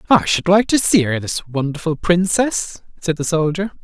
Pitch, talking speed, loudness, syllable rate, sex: 175 Hz, 190 wpm, -17 LUFS, 4.7 syllables/s, male